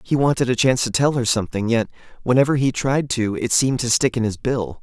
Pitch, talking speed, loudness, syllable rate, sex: 120 Hz, 250 wpm, -19 LUFS, 6.2 syllables/s, male